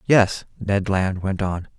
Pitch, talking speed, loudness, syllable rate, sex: 100 Hz, 170 wpm, -22 LUFS, 3.4 syllables/s, male